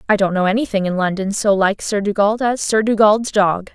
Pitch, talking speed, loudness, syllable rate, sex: 205 Hz, 225 wpm, -17 LUFS, 5.4 syllables/s, female